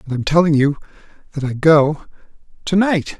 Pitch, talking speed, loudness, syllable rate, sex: 155 Hz, 150 wpm, -16 LUFS, 5.3 syllables/s, male